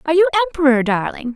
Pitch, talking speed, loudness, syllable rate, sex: 265 Hz, 175 wpm, -16 LUFS, 8.3 syllables/s, female